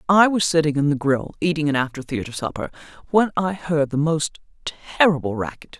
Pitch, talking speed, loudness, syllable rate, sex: 155 Hz, 185 wpm, -21 LUFS, 5.8 syllables/s, female